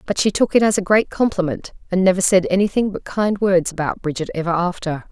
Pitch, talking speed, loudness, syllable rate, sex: 185 Hz, 225 wpm, -18 LUFS, 5.9 syllables/s, female